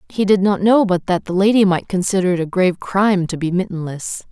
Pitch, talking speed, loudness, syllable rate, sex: 190 Hz, 235 wpm, -17 LUFS, 5.9 syllables/s, female